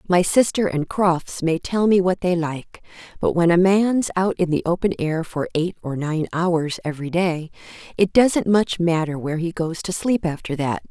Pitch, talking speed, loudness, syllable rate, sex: 175 Hz, 205 wpm, -21 LUFS, 4.6 syllables/s, female